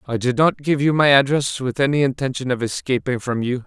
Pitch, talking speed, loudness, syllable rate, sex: 135 Hz, 230 wpm, -19 LUFS, 5.7 syllables/s, male